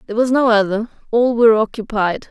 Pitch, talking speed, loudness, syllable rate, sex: 225 Hz, 180 wpm, -16 LUFS, 6.2 syllables/s, female